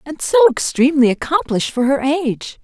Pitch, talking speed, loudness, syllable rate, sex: 285 Hz, 160 wpm, -16 LUFS, 6.0 syllables/s, female